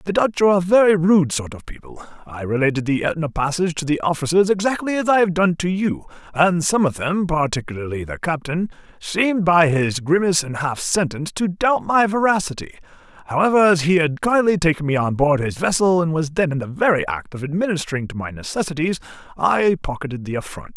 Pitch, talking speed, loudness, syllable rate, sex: 165 Hz, 200 wpm, -19 LUFS, 5.9 syllables/s, male